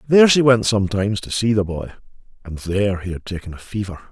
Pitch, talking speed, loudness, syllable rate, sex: 105 Hz, 205 wpm, -19 LUFS, 6.4 syllables/s, male